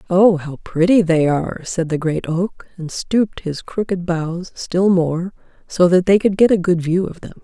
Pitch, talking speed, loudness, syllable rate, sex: 175 Hz, 210 wpm, -18 LUFS, 4.5 syllables/s, female